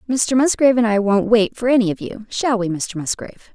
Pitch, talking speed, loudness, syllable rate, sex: 220 Hz, 235 wpm, -18 LUFS, 5.8 syllables/s, female